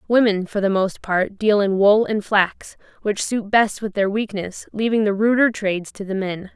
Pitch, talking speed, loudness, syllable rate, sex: 205 Hz, 210 wpm, -20 LUFS, 4.6 syllables/s, female